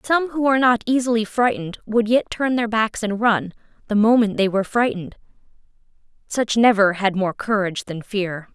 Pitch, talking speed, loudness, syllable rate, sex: 220 Hz, 175 wpm, -20 LUFS, 5.5 syllables/s, female